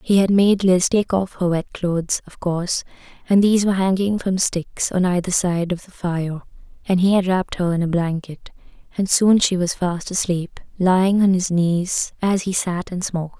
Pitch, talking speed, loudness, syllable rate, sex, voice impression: 180 Hz, 205 wpm, -19 LUFS, 4.9 syllables/s, female, feminine, slightly young, slightly relaxed, powerful, bright, soft, slightly muffled, slightly raspy, calm, reassuring, elegant, kind, modest